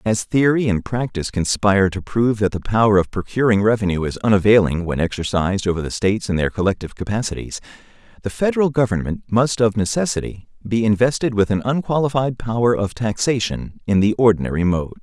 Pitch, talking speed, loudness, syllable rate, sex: 105 Hz, 170 wpm, -19 LUFS, 6.2 syllables/s, male